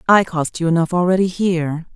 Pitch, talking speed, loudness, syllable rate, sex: 175 Hz, 185 wpm, -18 LUFS, 5.8 syllables/s, female